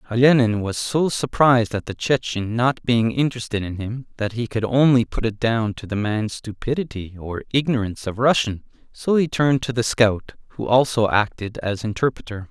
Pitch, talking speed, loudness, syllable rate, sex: 115 Hz, 180 wpm, -21 LUFS, 5.2 syllables/s, male